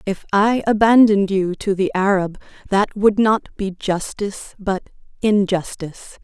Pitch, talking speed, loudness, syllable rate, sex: 200 Hz, 135 wpm, -18 LUFS, 4.7 syllables/s, female